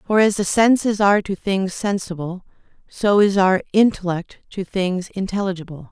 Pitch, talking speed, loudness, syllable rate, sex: 195 Hz, 150 wpm, -19 LUFS, 4.9 syllables/s, female